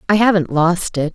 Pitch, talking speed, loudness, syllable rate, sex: 180 Hz, 210 wpm, -16 LUFS, 5.2 syllables/s, female